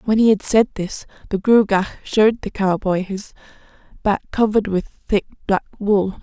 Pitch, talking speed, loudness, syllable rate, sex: 205 Hz, 165 wpm, -19 LUFS, 4.9 syllables/s, female